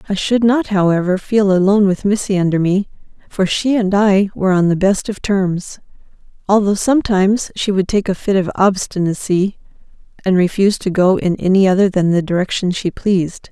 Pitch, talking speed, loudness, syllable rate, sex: 195 Hz, 180 wpm, -15 LUFS, 5.4 syllables/s, female